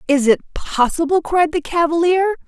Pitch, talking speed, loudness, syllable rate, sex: 320 Hz, 145 wpm, -17 LUFS, 4.8 syllables/s, female